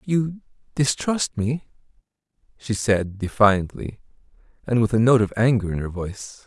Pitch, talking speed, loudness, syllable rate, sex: 115 Hz, 140 wpm, -22 LUFS, 4.1 syllables/s, male